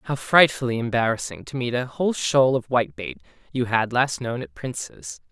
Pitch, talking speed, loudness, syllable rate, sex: 120 Hz, 180 wpm, -22 LUFS, 5.2 syllables/s, male